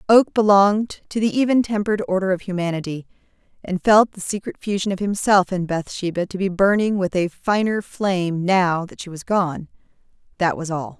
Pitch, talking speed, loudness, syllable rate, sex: 190 Hz, 175 wpm, -20 LUFS, 5.3 syllables/s, female